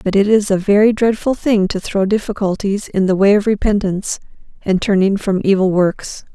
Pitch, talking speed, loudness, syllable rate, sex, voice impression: 200 Hz, 190 wpm, -15 LUFS, 5.2 syllables/s, female, very feminine, very adult-like, thin, tensed, slightly weak, slightly dark, slightly hard, clear, fluent, slightly raspy, slightly cute, cool, intellectual, refreshing, very sincere, very calm, friendly, reassuring, slightly unique, elegant, slightly wild, slightly sweet, slightly lively, kind, modest, slightly light